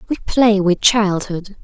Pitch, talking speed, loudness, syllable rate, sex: 200 Hz, 145 wpm, -15 LUFS, 3.6 syllables/s, female